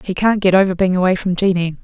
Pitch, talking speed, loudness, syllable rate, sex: 185 Hz, 260 wpm, -15 LUFS, 6.5 syllables/s, female